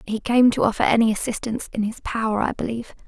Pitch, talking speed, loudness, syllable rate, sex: 230 Hz, 215 wpm, -22 LUFS, 6.8 syllables/s, female